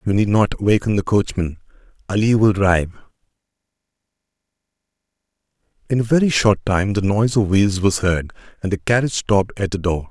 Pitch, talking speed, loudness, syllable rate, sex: 100 Hz, 160 wpm, -18 LUFS, 5.9 syllables/s, male